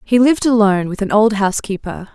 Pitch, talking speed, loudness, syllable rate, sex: 210 Hz, 195 wpm, -15 LUFS, 6.5 syllables/s, female